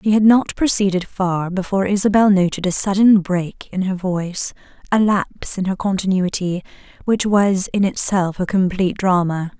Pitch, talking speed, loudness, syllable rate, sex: 190 Hz, 165 wpm, -18 LUFS, 5.0 syllables/s, female